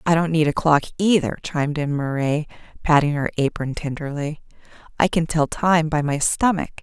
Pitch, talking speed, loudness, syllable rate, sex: 155 Hz, 175 wpm, -21 LUFS, 5.2 syllables/s, female